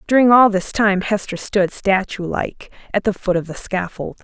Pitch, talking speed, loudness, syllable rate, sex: 200 Hz, 200 wpm, -18 LUFS, 4.7 syllables/s, female